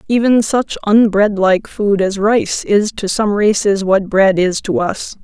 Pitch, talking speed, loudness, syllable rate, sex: 205 Hz, 170 wpm, -14 LUFS, 4.1 syllables/s, female